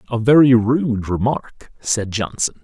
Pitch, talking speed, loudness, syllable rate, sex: 120 Hz, 135 wpm, -17 LUFS, 3.9 syllables/s, male